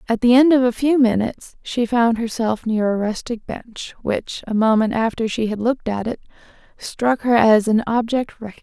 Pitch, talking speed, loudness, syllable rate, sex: 230 Hz, 200 wpm, -19 LUFS, 5.2 syllables/s, female